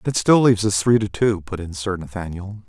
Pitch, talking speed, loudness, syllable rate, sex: 100 Hz, 245 wpm, -20 LUFS, 5.5 syllables/s, male